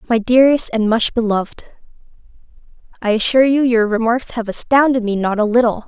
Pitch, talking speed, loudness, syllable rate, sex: 230 Hz, 165 wpm, -15 LUFS, 5.9 syllables/s, female